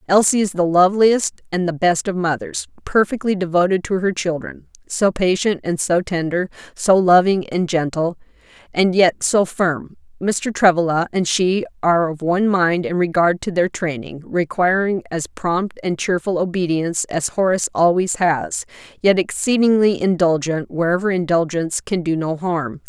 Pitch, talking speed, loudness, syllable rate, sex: 180 Hz, 155 wpm, -18 LUFS, 4.8 syllables/s, female